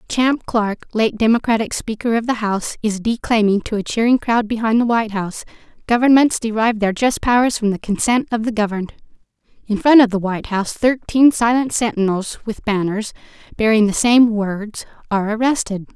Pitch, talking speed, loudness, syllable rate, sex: 220 Hz, 175 wpm, -17 LUFS, 5.6 syllables/s, female